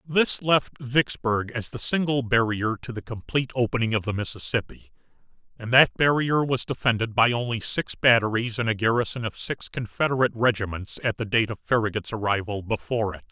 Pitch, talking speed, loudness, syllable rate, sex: 115 Hz, 170 wpm, -24 LUFS, 5.5 syllables/s, male